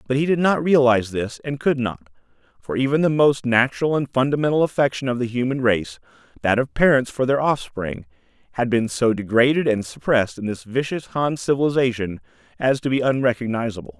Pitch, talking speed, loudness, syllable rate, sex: 125 Hz, 180 wpm, -20 LUFS, 5.8 syllables/s, male